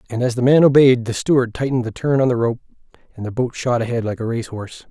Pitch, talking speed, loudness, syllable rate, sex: 120 Hz, 270 wpm, -18 LUFS, 6.8 syllables/s, male